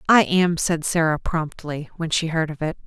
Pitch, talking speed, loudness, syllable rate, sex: 165 Hz, 210 wpm, -22 LUFS, 4.7 syllables/s, female